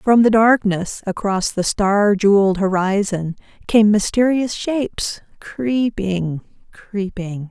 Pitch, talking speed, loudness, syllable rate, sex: 205 Hz, 105 wpm, -18 LUFS, 3.6 syllables/s, female